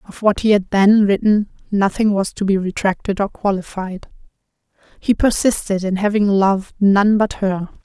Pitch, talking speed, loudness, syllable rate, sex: 200 Hz, 160 wpm, -17 LUFS, 4.8 syllables/s, female